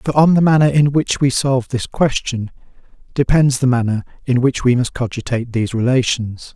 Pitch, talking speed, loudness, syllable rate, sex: 130 Hz, 185 wpm, -16 LUFS, 5.5 syllables/s, male